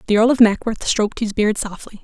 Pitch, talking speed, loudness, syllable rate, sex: 215 Hz, 235 wpm, -17 LUFS, 6.0 syllables/s, female